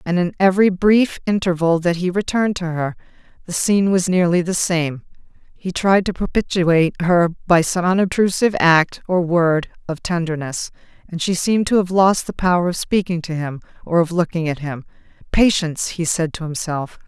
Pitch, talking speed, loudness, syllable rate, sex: 175 Hz, 180 wpm, -18 LUFS, 5.2 syllables/s, female